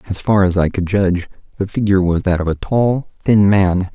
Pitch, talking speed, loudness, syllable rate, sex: 95 Hz, 230 wpm, -16 LUFS, 5.4 syllables/s, male